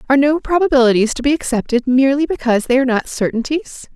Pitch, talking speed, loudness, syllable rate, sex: 265 Hz, 180 wpm, -15 LUFS, 7.0 syllables/s, female